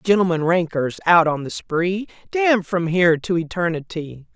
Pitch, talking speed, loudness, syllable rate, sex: 175 Hz, 150 wpm, -20 LUFS, 4.9 syllables/s, female